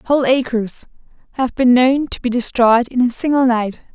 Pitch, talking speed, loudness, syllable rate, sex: 250 Hz, 180 wpm, -16 LUFS, 4.8 syllables/s, female